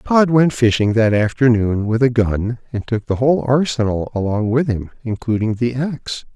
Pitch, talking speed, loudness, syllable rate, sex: 120 Hz, 180 wpm, -17 LUFS, 4.9 syllables/s, male